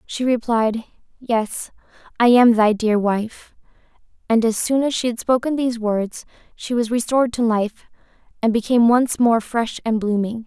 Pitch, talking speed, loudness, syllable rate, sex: 230 Hz, 165 wpm, -19 LUFS, 4.7 syllables/s, female